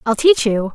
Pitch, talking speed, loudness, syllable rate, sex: 245 Hz, 240 wpm, -15 LUFS, 4.8 syllables/s, female